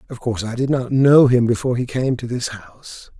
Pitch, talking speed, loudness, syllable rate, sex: 125 Hz, 245 wpm, -18 LUFS, 5.8 syllables/s, male